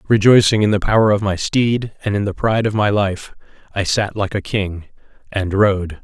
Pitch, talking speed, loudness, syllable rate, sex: 100 Hz, 210 wpm, -17 LUFS, 5.0 syllables/s, male